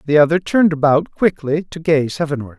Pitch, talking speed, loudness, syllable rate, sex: 150 Hz, 185 wpm, -16 LUFS, 5.8 syllables/s, male